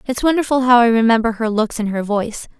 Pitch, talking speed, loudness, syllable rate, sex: 230 Hz, 230 wpm, -16 LUFS, 6.4 syllables/s, female